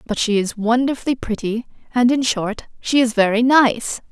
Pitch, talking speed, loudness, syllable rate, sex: 235 Hz, 175 wpm, -18 LUFS, 4.9 syllables/s, female